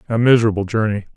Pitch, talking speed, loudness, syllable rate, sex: 110 Hz, 155 wpm, -17 LUFS, 7.8 syllables/s, male